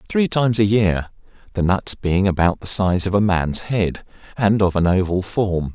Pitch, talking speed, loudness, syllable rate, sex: 95 Hz, 200 wpm, -19 LUFS, 4.6 syllables/s, male